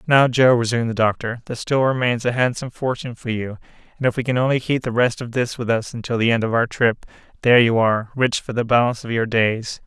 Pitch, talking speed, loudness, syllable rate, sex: 120 Hz, 245 wpm, -20 LUFS, 6.4 syllables/s, male